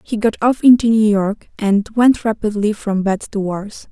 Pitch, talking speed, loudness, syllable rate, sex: 215 Hz, 200 wpm, -16 LUFS, 4.6 syllables/s, female